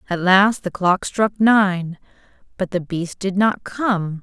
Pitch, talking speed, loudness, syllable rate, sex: 190 Hz, 170 wpm, -19 LUFS, 3.5 syllables/s, female